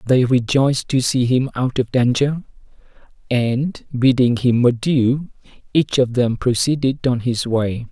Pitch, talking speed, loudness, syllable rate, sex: 125 Hz, 145 wpm, -18 LUFS, 4.1 syllables/s, male